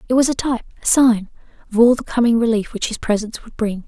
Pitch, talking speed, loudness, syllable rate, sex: 230 Hz, 245 wpm, -18 LUFS, 6.7 syllables/s, female